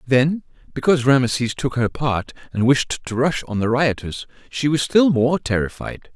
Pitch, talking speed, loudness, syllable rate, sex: 130 Hz, 175 wpm, -20 LUFS, 4.7 syllables/s, male